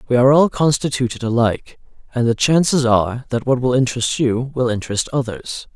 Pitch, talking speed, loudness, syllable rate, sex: 125 Hz, 175 wpm, -17 LUFS, 5.9 syllables/s, male